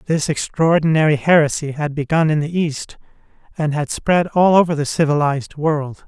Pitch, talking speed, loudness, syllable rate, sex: 155 Hz, 160 wpm, -17 LUFS, 5.1 syllables/s, male